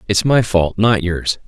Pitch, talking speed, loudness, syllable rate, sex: 100 Hz, 205 wpm, -16 LUFS, 4.0 syllables/s, male